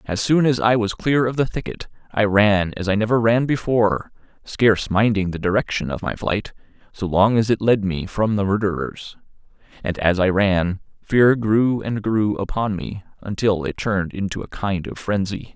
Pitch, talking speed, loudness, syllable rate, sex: 105 Hz, 195 wpm, -20 LUFS, 4.8 syllables/s, male